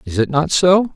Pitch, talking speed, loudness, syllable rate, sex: 160 Hz, 250 wpm, -15 LUFS, 4.8 syllables/s, male